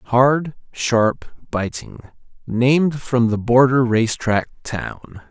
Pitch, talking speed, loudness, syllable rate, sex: 120 Hz, 115 wpm, -18 LUFS, 3.0 syllables/s, male